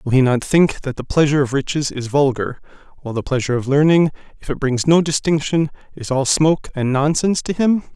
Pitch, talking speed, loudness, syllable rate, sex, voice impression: 145 Hz, 210 wpm, -18 LUFS, 6.1 syllables/s, male, masculine, adult-like, fluent, slightly intellectual, slightly refreshing, slightly friendly